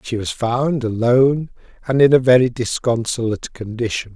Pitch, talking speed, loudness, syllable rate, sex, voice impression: 120 Hz, 145 wpm, -17 LUFS, 5.2 syllables/s, male, masculine, old, relaxed, powerful, hard, muffled, raspy, calm, mature, wild, lively, strict, slightly intense, sharp